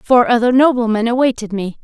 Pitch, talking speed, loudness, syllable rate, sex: 235 Hz, 165 wpm, -14 LUFS, 5.7 syllables/s, female